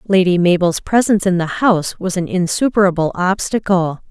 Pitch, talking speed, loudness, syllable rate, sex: 185 Hz, 145 wpm, -16 LUFS, 5.4 syllables/s, female